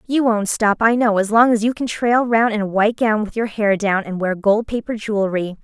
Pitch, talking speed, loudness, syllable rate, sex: 215 Hz, 265 wpm, -18 LUFS, 5.3 syllables/s, female